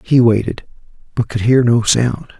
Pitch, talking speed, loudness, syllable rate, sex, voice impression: 120 Hz, 175 wpm, -15 LUFS, 4.7 syllables/s, male, masculine, slightly old, slightly thick, soft, sincere, very calm